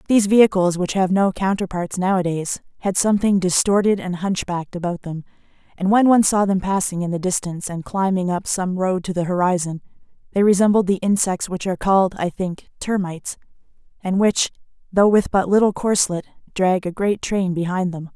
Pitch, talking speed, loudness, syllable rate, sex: 190 Hz, 180 wpm, -20 LUFS, 5.6 syllables/s, female